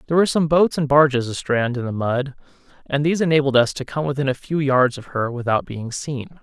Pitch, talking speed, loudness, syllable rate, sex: 140 Hz, 235 wpm, -20 LUFS, 6.1 syllables/s, male